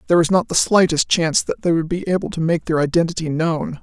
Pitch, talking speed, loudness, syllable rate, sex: 165 Hz, 250 wpm, -18 LUFS, 6.3 syllables/s, female